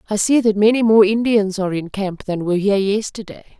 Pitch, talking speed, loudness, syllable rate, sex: 205 Hz, 215 wpm, -17 LUFS, 6.1 syllables/s, female